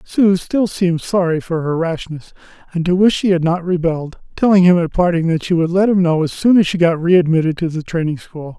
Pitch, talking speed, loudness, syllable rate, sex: 170 Hz, 245 wpm, -16 LUFS, 5.7 syllables/s, male